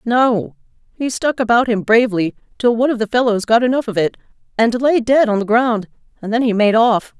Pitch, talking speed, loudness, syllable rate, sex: 230 Hz, 215 wpm, -16 LUFS, 5.5 syllables/s, female